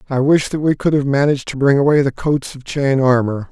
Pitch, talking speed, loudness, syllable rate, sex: 140 Hz, 255 wpm, -16 LUFS, 5.7 syllables/s, male